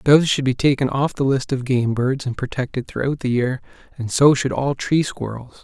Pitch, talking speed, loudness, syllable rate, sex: 130 Hz, 225 wpm, -20 LUFS, 5.2 syllables/s, male